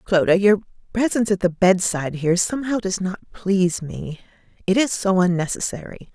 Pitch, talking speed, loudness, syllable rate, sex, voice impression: 190 Hz, 165 wpm, -20 LUFS, 5.5 syllables/s, female, feminine, adult-like, tensed, powerful, clear, fluent, intellectual, friendly, reassuring, lively, slightly strict